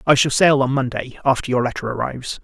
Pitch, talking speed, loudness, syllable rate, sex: 130 Hz, 220 wpm, -19 LUFS, 6.2 syllables/s, male